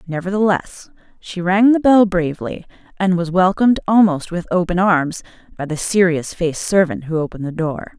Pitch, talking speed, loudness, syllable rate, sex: 180 Hz, 165 wpm, -17 LUFS, 5.3 syllables/s, female